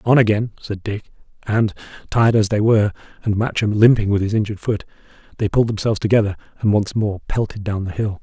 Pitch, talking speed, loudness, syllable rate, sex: 105 Hz, 195 wpm, -19 LUFS, 6.4 syllables/s, male